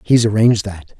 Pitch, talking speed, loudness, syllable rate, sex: 105 Hz, 180 wpm, -15 LUFS, 5.7 syllables/s, male